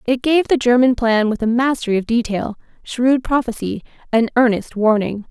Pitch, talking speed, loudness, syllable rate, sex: 235 Hz, 170 wpm, -17 LUFS, 5.1 syllables/s, female